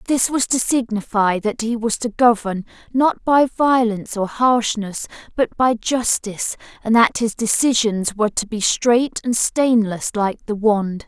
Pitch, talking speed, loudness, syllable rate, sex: 225 Hz, 165 wpm, -18 LUFS, 4.2 syllables/s, female